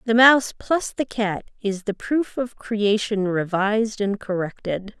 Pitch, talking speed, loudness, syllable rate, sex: 215 Hz, 155 wpm, -22 LUFS, 4.1 syllables/s, female